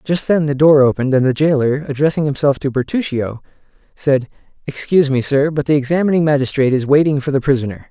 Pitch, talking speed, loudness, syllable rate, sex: 140 Hz, 180 wpm, -15 LUFS, 6.4 syllables/s, male